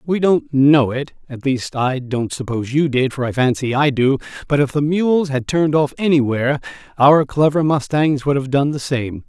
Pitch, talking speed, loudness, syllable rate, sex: 140 Hz, 195 wpm, -17 LUFS, 5.0 syllables/s, male